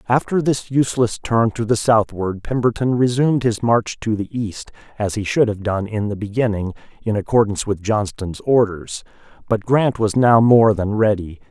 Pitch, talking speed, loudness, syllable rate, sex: 110 Hz, 175 wpm, -18 LUFS, 4.9 syllables/s, male